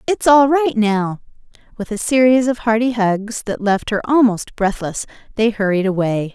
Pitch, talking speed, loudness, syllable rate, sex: 220 Hz, 170 wpm, -17 LUFS, 4.6 syllables/s, female